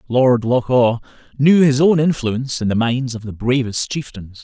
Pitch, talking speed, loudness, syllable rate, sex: 125 Hz, 190 wpm, -17 LUFS, 4.7 syllables/s, male